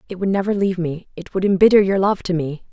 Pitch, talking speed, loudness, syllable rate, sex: 185 Hz, 265 wpm, -18 LUFS, 6.6 syllables/s, female